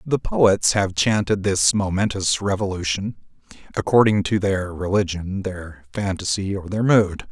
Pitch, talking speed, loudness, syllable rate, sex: 95 Hz, 130 wpm, -20 LUFS, 4.3 syllables/s, male